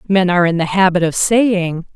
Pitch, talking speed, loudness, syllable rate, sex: 185 Hz, 215 wpm, -14 LUFS, 5.2 syllables/s, female